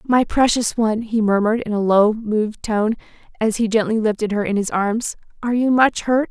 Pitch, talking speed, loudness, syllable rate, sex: 220 Hz, 210 wpm, -19 LUFS, 5.4 syllables/s, female